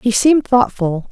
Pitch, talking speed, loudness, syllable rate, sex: 225 Hz, 160 wpm, -14 LUFS, 4.7 syllables/s, female